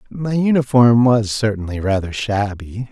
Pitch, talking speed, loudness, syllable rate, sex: 115 Hz, 125 wpm, -17 LUFS, 4.4 syllables/s, male